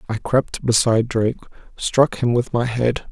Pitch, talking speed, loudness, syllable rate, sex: 120 Hz, 175 wpm, -19 LUFS, 4.9 syllables/s, male